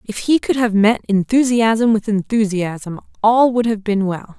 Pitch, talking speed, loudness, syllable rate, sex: 215 Hz, 180 wpm, -16 LUFS, 4.3 syllables/s, female